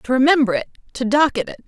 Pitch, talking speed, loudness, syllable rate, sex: 265 Hz, 180 wpm, -18 LUFS, 6.6 syllables/s, female